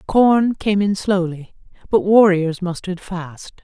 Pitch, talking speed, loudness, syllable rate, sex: 190 Hz, 130 wpm, -17 LUFS, 3.9 syllables/s, female